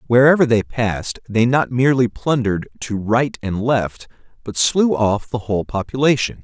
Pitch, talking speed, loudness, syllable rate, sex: 120 Hz, 160 wpm, -18 LUFS, 5.0 syllables/s, male